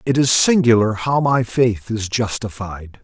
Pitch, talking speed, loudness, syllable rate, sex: 115 Hz, 160 wpm, -17 LUFS, 4.1 syllables/s, male